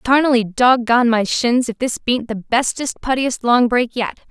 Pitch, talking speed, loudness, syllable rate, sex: 240 Hz, 180 wpm, -17 LUFS, 4.6 syllables/s, female